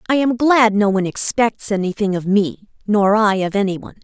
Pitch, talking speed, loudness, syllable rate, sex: 210 Hz, 195 wpm, -17 LUFS, 5.6 syllables/s, female